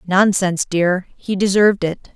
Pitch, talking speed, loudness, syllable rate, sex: 190 Hz, 140 wpm, -17 LUFS, 4.7 syllables/s, female